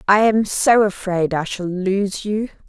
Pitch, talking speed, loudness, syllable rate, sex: 200 Hz, 180 wpm, -18 LUFS, 3.8 syllables/s, female